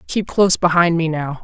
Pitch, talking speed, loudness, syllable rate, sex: 170 Hz, 210 wpm, -16 LUFS, 5.4 syllables/s, female